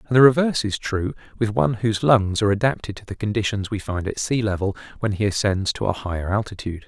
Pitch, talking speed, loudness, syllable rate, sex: 105 Hz, 220 wpm, -22 LUFS, 6.5 syllables/s, male